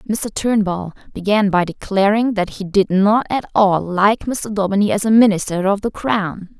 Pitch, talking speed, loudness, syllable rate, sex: 205 Hz, 180 wpm, -17 LUFS, 4.6 syllables/s, female